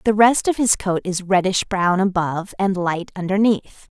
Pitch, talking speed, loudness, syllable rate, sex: 190 Hz, 180 wpm, -19 LUFS, 4.7 syllables/s, female